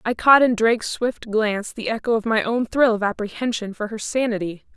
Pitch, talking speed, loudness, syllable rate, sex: 225 Hz, 215 wpm, -21 LUFS, 5.5 syllables/s, female